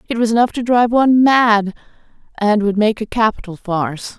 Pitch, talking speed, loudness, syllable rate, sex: 220 Hz, 185 wpm, -15 LUFS, 5.6 syllables/s, female